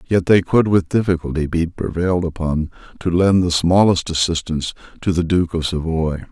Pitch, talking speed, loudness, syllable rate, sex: 85 Hz, 170 wpm, -18 LUFS, 5.2 syllables/s, male